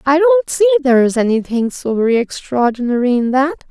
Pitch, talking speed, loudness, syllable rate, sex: 275 Hz, 160 wpm, -15 LUFS, 5.4 syllables/s, female